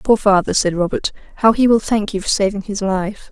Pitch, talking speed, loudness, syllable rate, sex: 205 Hz, 235 wpm, -17 LUFS, 5.5 syllables/s, female